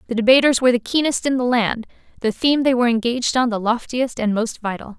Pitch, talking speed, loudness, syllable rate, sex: 240 Hz, 230 wpm, -19 LUFS, 6.5 syllables/s, female